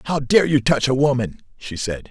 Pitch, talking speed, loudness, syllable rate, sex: 135 Hz, 230 wpm, -19 LUFS, 5.2 syllables/s, male